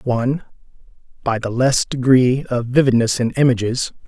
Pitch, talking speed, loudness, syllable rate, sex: 125 Hz, 130 wpm, -17 LUFS, 5.3 syllables/s, male